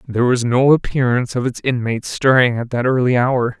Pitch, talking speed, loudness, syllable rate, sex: 125 Hz, 200 wpm, -16 LUFS, 5.7 syllables/s, male